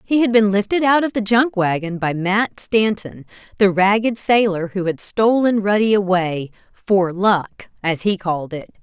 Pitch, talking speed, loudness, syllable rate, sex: 200 Hz, 175 wpm, -18 LUFS, 4.4 syllables/s, female